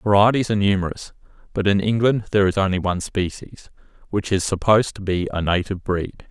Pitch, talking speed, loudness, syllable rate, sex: 100 Hz, 190 wpm, -20 LUFS, 7.2 syllables/s, male